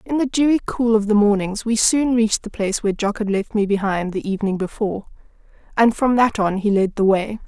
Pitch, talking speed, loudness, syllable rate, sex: 215 Hz, 235 wpm, -19 LUFS, 6.0 syllables/s, female